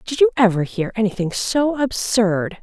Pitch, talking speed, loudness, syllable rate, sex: 220 Hz, 160 wpm, -19 LUFS, 4.5 syllables/s, female